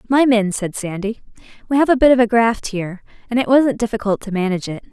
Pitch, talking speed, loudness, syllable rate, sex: 225 Hz, 230 wpm, -17 LUFS, 6.3 syllables/s, female